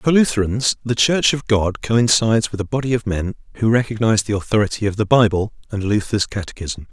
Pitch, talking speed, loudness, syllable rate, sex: 110 Hz, 190 wpm, -18 LUFS, 5.8 syllables/s, male